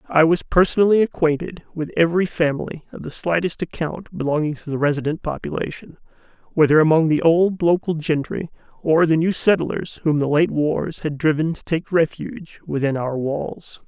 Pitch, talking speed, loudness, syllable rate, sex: 160 Hz, 165 wpm, -20 LUFS, 5.2 syllables/s, male